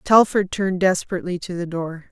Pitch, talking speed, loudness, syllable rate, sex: 180 Hz, 170 wpm, -21 LUFS, 6.1 syllables/s, female